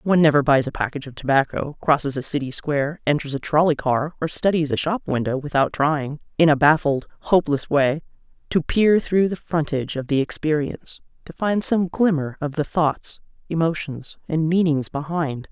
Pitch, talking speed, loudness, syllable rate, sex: 150 Hz, 180 wpm, -21 LUFS, 5.3 syllables/s, female